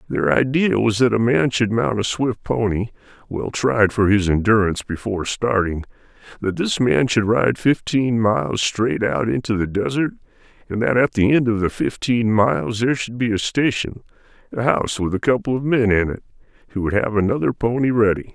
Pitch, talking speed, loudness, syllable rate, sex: 110 Hz, 195 wpm, -19 LUFS, 5.2 syllables/s, male